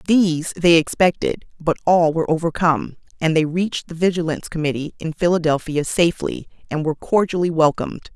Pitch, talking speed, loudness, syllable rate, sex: 165 Hz, 145 wpm, -19 LUFS, 6.0 syllables/s, female